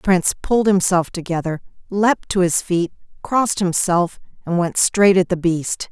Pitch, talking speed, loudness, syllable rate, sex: 180 Hz, 170 wpm, -18 LUFS, 4.8 syllables/s, female